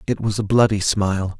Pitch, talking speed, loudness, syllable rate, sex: 105 Hz, 215 wpm, -19 LUFS, 5.7 syllables/s, male